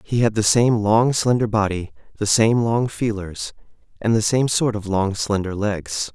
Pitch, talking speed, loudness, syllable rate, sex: 110 Hz, 185 wpm, -20 LUFS, 4.4 syllables/s, male